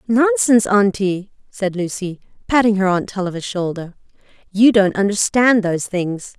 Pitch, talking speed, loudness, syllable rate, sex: 200 Hz, 130 wpm, -17 LUFS, 4.8 syllables/s, female